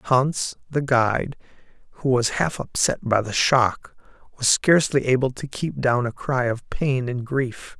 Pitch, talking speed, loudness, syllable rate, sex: 130 Hz, 170 wpm, -22 LUFS, 4.1 syllables/s, male